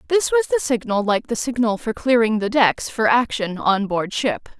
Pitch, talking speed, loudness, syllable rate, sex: 230 Hz, 210 wpm, -20 LUFS, 4.7 syllables/s, female